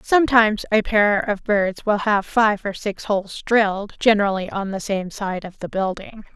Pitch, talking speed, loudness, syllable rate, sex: 205 Hz, 190 wpm, -20 LUFS, 4.8 syllables/s, female